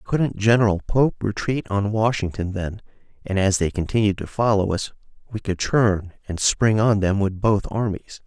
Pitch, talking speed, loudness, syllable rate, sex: 105 Hz, 175 wpm, -21 LUFS, 4.7 syllables/s, male